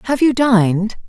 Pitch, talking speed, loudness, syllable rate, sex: 230 Hz, 165 wpm, -15 LUFS, 4.8 syllables/s, female